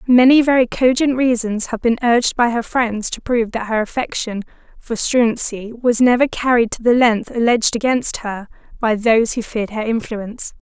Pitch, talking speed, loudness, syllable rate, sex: 235 Hz, 180 wpm, -17 LUFS, 5.1 syllables/s, female